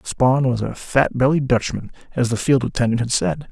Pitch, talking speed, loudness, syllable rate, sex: 125 Hz, 205 wpm, -19 LUFS, 5.0 syllables/s, male